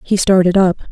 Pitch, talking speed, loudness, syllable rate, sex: 185 Hz, 195 wpm, -13 LUFS, 5.7 syllables/s, female